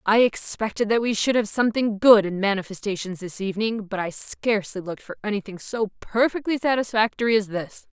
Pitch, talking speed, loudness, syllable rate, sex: 210 Hz, 175 wpm, -23 LUFS, 5.8 syllables/s, female